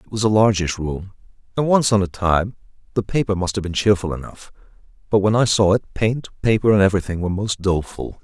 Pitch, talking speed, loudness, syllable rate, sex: 100 Hz, 210 wpm, -19 LUFS, 6.1 syllables/s, male